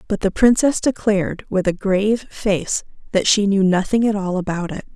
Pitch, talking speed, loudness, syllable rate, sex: 200 Hz, 195 wpm, -19 LUFS, 5.0 syllables/s, female